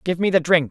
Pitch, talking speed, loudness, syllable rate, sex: 170 Hz, 340 wpm, -18 LUFS, 6.1 syllables/s, male